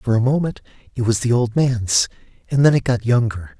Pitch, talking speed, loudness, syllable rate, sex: 120 Hz, 215 wpm, -18 LUFS, 5.3 syllables/s, male